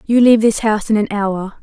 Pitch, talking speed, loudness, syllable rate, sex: 215 Hz, 260 wpm, -15 LUFS, 6.5 syllables/s, female